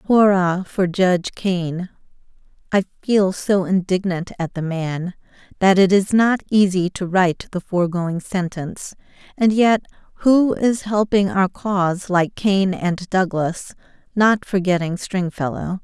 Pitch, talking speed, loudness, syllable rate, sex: 190 Hz, 135 wpm, -19 LUFS, 4.1 syllables/s, female